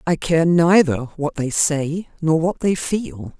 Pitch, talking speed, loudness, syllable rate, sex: 155 Hz, 175 wpm, -19 LUFS, 3.5 syllables/s, female